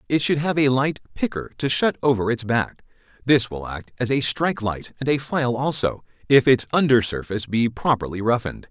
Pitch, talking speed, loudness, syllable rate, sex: 125 Hz, 200 wpm, -21 LUFS, 5.4 syllables/s, male